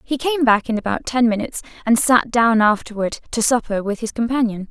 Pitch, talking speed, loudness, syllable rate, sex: 230 Hz, 205 wpm, -18 LUFS, 5.7 syllables/s, female